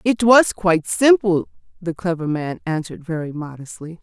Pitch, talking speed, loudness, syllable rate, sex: 180 Hz, 150 wpm, -18 LUFS, 5.0 syllables/s, female